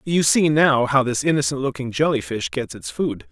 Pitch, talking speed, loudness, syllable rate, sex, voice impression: 130 Hz, 215 wpm, -20 LUFS, 5.0 syllables/s, male, masculine, adult-like, clear, slightly fluent, refreshing, friendly, slightly intense